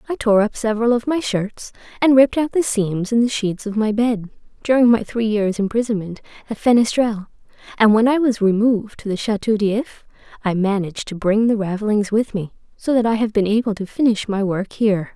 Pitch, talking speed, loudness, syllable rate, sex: 220 Hz, 210 wpm, -18 LUFS, 5.6 syllables/s, female